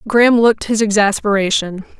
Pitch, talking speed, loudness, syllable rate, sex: 210 Hz, 120 wpm, -14 LUFS, 5.8 syllables/s, female